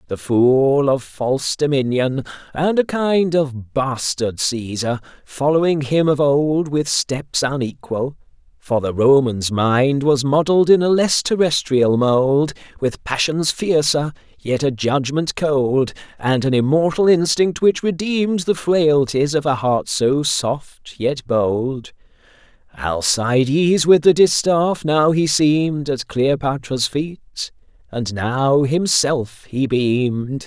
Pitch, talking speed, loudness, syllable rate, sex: 140 Hz, 130 wpm, -18 LUFS, 4.0 syllables/s, male